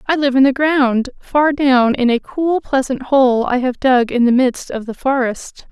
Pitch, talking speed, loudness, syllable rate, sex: 260 Hz, 220 wpm, -15 LUFS, 4.2 syllables/s, female